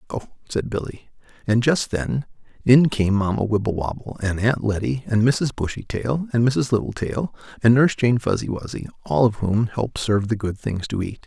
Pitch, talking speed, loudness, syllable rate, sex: 115 Hz, 180 wpm, -22 LUFS, 5.2 syllables/s, male